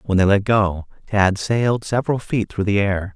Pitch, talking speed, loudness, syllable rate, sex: 105 Hz, 210 wpm, -19 LUFS, 4.9 syllables/s, male